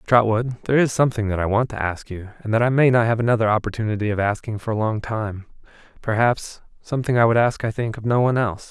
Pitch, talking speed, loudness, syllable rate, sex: 110 Hz, 235 wpm, -21 LUFS, 6.6 syllables/s, male